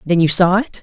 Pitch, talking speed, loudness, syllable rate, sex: 190 Hz, 290 wpm, -13 LUFS, 6.2 syllables/s, female